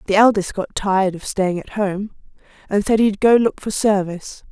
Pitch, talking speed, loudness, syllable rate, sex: 200 Hz, 200 wpm, -18 LUFS, 5.2 syllables/s, female